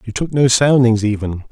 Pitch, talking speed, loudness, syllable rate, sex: 120 Hz, 200 wpm, -15 LUFS, 5.1 syllables/s, male